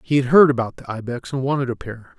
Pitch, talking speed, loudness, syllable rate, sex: 130 Hz, 275 wpm, -19 LUFS, 6.2 syllables/s, male